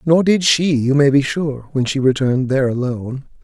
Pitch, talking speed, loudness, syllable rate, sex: 140 Hz, 210 wpm, -16 LUFS, 5.4 syllables/s, male